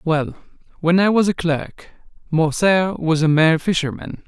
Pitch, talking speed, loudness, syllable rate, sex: 165 Hz, 155 wpm, -18 LUFS, 4.5 syllables/s, male